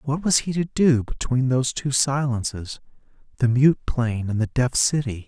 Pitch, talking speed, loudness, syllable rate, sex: 130 Hz, 170 wpm, -22 LUFS, 4.6 syllables/s, male